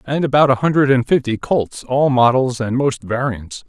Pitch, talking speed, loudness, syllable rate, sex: 130 Hz, 195 wpm, -16 LUFS, 4.8 syllables/s, male